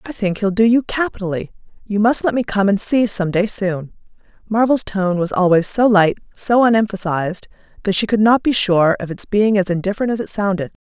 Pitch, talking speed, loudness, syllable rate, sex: 205 Hz, 205 wpm, -17 LUFS, 5.6 syllables/s, female